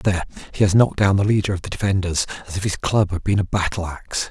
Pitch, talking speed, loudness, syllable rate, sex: 95 Hz, 265 wpm, -20 LUFS, 7.1 syllables/s, male